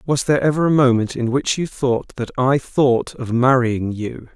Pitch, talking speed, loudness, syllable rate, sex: 130 Hz, 205 wpm, -18 LUFS, 4.7 syllables/s, male